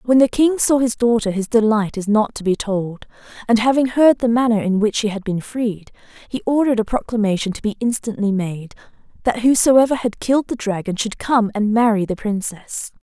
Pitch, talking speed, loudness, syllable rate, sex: 225 Hz, 205 wpm, -18 LUFS, 5.3 syllables/s, female